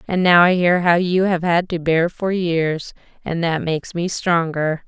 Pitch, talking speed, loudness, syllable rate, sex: 170 Hz, 210 wpm, -18 LUFS, 4.3 syllables/s, female